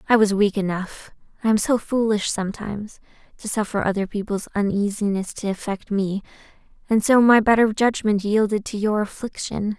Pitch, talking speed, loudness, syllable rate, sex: 210 Hz, 145 wpm, -21 LUFS, 5.2 syllables/s, female